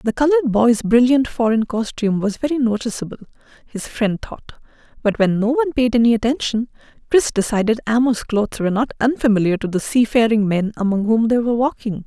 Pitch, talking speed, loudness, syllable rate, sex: 230 Hz, 175 wpm, -18 LUFS, 5.9 syllables/s, female